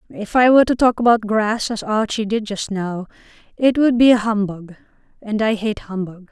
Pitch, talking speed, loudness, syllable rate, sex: 215 Hz, 200 wpm, -18 LUFS, 5.0 syllables/s, female